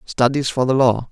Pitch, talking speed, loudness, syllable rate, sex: 125 Hz, 215 wpm, -18 LUFS, 5.0 syllables/s, male